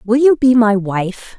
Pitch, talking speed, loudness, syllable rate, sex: 230 Hz, 215 wpm, -13 LUFS, 3.9 syllables/s, female